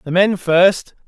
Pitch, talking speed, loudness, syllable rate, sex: 180 Hz, 170 wpm, -14 LUFS, 3.5 syllables/s, male